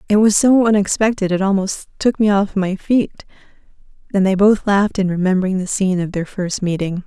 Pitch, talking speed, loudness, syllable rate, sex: 195 Hz, 195 wpm, -17 LUFS, 5.6 syllables/s, female